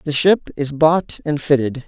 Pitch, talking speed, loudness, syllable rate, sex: 145 Hz, 190 wpm, -17 LUFS, 4.3 syllables/s, male